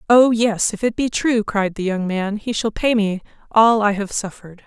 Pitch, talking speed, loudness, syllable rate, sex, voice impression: 215 Hz, 230 wpm, -18 LUFS, 4.8 syllables/s, female, feminine, adult-like, slightly fluent, intellectual, slightly calm